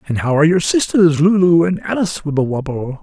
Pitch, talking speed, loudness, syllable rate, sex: 165 Hz, 180 wpm, -15 LUFS, 5.9 syllables/s, male